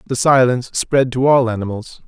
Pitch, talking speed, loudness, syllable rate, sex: 125 Hz, 175 wpm, -16 LUFS, 5.5 syllables/s, male